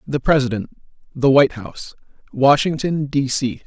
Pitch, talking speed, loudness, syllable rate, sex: 135 Hz, 130 wpm, -18 LUFS, 5.0 syllables/s, male